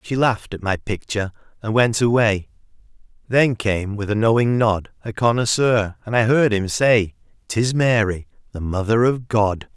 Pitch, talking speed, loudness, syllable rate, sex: 110 Hz, 165 wpm, -19 LUFS, 4.6 syllables/s, male